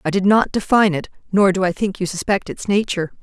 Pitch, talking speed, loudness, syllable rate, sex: 195 Hz, 240 wpm, -18 LUFS, 6.3 syllables/s, female